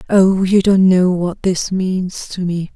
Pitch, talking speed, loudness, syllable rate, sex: 185 Hz, 195 wpm, -15 LUFS, 3.5 syllables/s, female